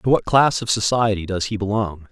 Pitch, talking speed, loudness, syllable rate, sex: 105 Hz, 225 wpm, -19 LUFS, 5.3 syllables/s, male